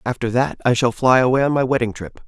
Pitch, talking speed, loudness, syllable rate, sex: 120 Hz, 265 wpm, -18 LUFS, 6.1 syllables/s, male